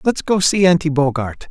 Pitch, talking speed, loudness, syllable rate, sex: 160 Hz, 200 wpm, -16 LUFS, 5.0 syllables/s, male